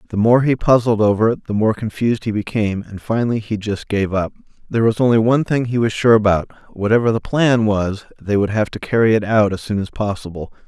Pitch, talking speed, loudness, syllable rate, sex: 110 Hz, 230 wpm, -17 LUFS, 6.0 syllables/s, male